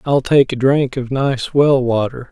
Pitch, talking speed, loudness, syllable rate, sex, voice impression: 130 Hz, 210 wpm, -15 LUFS, 4.1 syllables/s, male, masculine, adult-like, slightly middle-aged, slightly thin, relaxed, weak, slightly dark, slightly hard, slightly muffled, slightly halting, slightly raspy, slightly cool, very intellectual, sincere, calm, slightly mature, slightly friendly, reassuring, elegant, slightly sweet, very kind, very modest